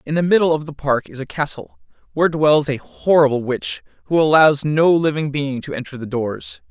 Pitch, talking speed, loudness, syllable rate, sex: 145 Hz, 205 wpm, -18 LUFS, 5.2 syllables/s, male